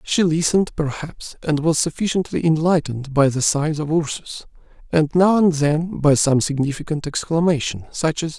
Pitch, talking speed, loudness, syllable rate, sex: 155 Hz, 155 wpm, -19 LUFS, 4.9 syllables/s, male